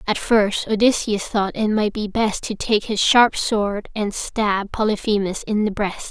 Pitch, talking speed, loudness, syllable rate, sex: 210 Hz, 185 wpm, -20 LUFS, 4.1 syllables/s, female